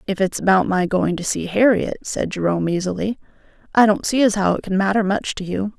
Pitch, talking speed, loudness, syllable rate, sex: 195 Hz, 230 wpm, -19 LUFS, 5.8 syllables/s, female